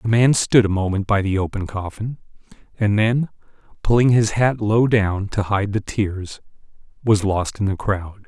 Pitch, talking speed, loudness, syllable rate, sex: 105 Hz, 180 wpm, -20 LUFS, 4.4 syllables/s, male